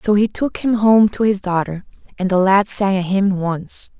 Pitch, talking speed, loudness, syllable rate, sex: 195 Hz, 225 wpm, -17 LUFS, 4.6 syllables/s, female